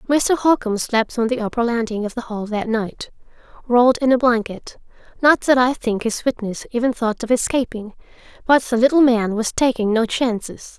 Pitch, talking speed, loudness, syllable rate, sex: 235 Hz, 185 wpm, -19 LUFS, 5.2 syllables/s, female